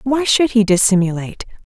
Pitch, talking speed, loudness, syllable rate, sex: 220 Hz, 145 wpm, -14 LUFS, 5.8 syllables/s, female